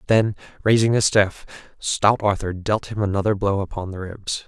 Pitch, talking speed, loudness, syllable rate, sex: 100 Hz, 175 wpm, -21 LUFS, 4.9 syllables/s, male